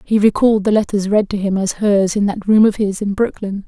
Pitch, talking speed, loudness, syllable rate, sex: 205 Hz, 260 wpm, -16 LUFS, 5.6 syllables/s, female